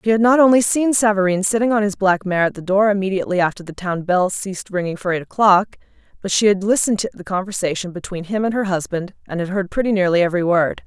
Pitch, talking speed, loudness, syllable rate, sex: 195 Hz, 235 wpm, -18 LUFS, 6.5 syllables/s, female